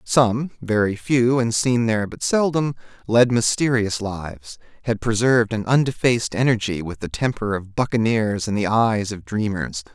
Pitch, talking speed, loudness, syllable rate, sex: 115 Hz, 155 wpm, -21 LUFS, 4.7 syllables/s, male